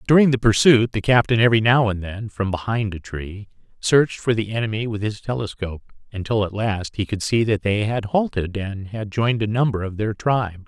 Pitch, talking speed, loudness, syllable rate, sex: 110 Hz, 215 wpm, -21 LUFS, 5.6 syllables/s, male